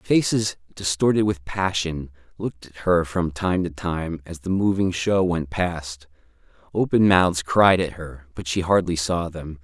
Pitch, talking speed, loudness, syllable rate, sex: 85 Hz, 170 wpm, -22 LUFS, 4.2 syllables/s, male